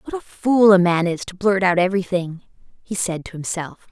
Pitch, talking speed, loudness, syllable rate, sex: 190 Hz, 215 wpm, -19 LUFS, 5.3 syllables/s, female